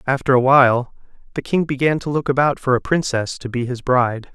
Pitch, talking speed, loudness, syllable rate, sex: 135 Hz, 220 wpm, -18 LUFS, 5.8 syllables/s, male